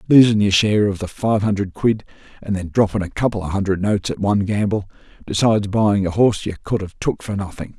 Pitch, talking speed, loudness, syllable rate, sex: 100 Hz, 225 wpm, -19 LUFS, 6.2 syllables/s, male